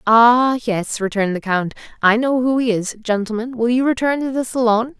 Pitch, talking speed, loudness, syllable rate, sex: 235 Hz, 205 wpm, -18 LUFS, 5.1 syllables/s, female